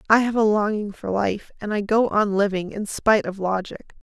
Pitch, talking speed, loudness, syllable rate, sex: 205 Hz, 215 wpm, -22 LUFS, 5.2 syllables/s, female